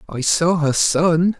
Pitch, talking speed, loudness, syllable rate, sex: 165 Hz, 170 wpm, -17 LUFS, 3.3 syllables/s, male